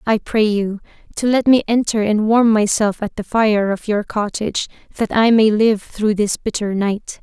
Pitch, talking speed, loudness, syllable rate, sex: 215 Hz, 200 wpm, -17 LUFS, 4.5 syllables/s, female